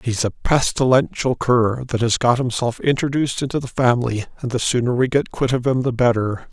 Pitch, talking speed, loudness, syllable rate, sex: 125 Hz, 200 wpm, -19 LUFS, 5.4 syllables/s, male